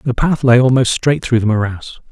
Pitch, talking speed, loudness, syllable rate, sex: 125 Hz, 225 wpm, -14 LUFS, 5.0 syllables/s, male